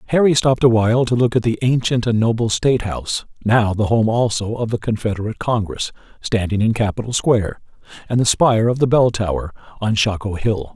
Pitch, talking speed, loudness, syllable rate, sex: 115 Hz, 195 wpm, -18 LUFS, 5.9 syllables/s, male